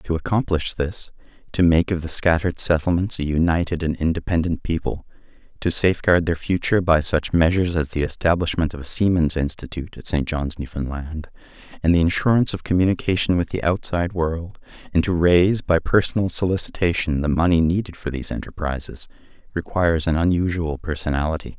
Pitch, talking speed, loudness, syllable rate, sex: 85 Hz, 160 wpm, -21 LUFS, 5.9 syllables/s, male